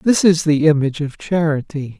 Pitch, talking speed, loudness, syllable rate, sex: 155 Hz, 180 wpm, -17 LUFS, 5.1 syllables/s, male